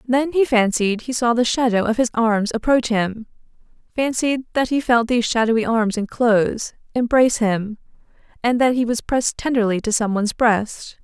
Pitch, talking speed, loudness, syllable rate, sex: 235 Hz, 165 wpm, -19 LUFS, 5.1 syllables/s, female